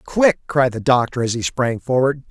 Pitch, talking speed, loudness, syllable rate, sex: 130 Hz, 210 wpm, -18 LUFS, 4.9 syllables/s, male